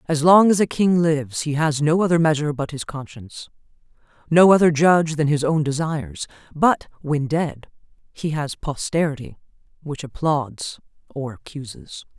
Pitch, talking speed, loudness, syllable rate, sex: 150 Hz, 150 wpm, -20 LUFS, 4.9 syllables/s, female